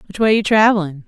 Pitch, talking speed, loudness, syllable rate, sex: 200 Hz, 225 wpm, -15 LUFS, 6.5 syllables/s, female